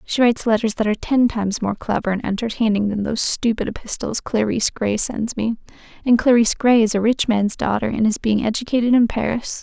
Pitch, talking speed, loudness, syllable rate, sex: 220 Hz, 200 wpm, -19 LUFS, 6.0 syllables/s, female